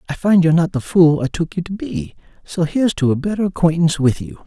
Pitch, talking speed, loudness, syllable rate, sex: 165 Hz, 255 wpm, -17 LUFS, 6.4 syllables/s, male